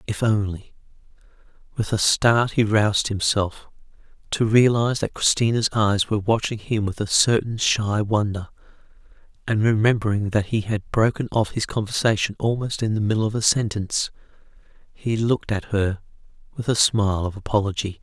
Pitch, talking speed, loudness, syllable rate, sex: 105 Hz, 155 wpm, -21 LUFS, 5.3 syllables/s, male